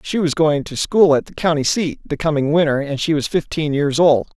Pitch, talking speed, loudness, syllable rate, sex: 155 Hz, 245 wpm, -17 LUFS, 5.3 syllables/s, male